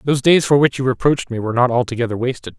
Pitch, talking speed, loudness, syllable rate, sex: 130 Hz, 255 wpm, -17 LUFS, 7.6 syllables/s, male